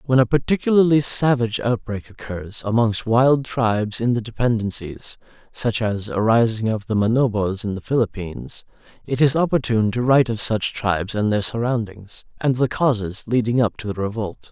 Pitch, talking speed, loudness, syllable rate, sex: 115 Hz, 170 wpm, -20 LUFS, 5.2 syllables/s, male